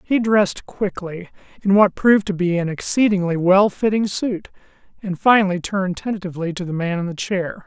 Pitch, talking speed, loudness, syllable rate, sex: 190 Hz, 180 wpm, -19 LUFS, 5.5 syllables/s, male